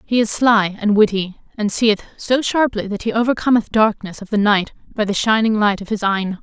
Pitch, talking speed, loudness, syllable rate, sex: 215 Hz, 215 wpm, -17 LUFS, 6.1 syllables/s, female